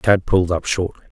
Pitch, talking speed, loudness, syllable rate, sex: 90 Hz, 200 wpm, -19 LUFS, 5.8 syllables/s, male